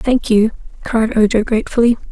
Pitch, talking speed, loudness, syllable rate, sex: 225 Hz, 140 wpm, -15 LUFS, 5.5 syllables/s, female